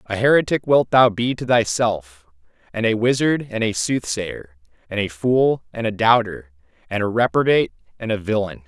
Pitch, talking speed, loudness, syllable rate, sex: 110 Hz, 180 wpm, -19 LUFS, 5.0 syllables/s, male